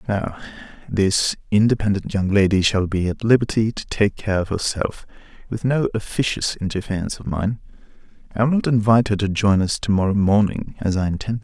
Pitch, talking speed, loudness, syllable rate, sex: 105 Hz, 180 wpm, -20 LUFS, 5.6 syllables/s, male